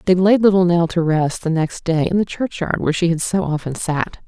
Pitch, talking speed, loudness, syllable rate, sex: 170 Hz, 250 wpm, -18 LUFS, 5.5 syllables/s, female